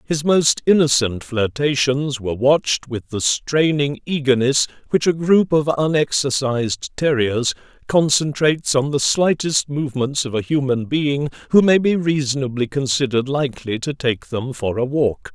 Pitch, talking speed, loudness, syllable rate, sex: 140 Hz, 145 wpm, -19 LUFS, 4.6 syllables/s, male